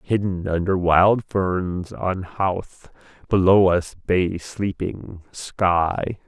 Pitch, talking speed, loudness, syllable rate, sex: 90 Hz, 105 wpm, -21 LUFS, 2.7 syllables/s, male